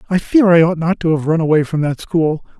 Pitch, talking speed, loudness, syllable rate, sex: 165 Hz, 275 wpm, -15 LUFS, 5.7 syllables/s, male